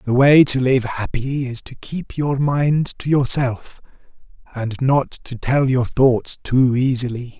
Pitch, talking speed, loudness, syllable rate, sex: 130 Hz, 160 wpm, -18 LUFS, 3.7 syllables/s, male